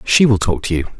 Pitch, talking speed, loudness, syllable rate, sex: 100 Hz, 300 wpm, -16 LUFS, 6.0 syllables/s, male